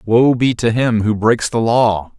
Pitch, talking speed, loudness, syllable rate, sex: 115 Hz, 220 wpm, -15 LUFS, 3.9 syllables/s, male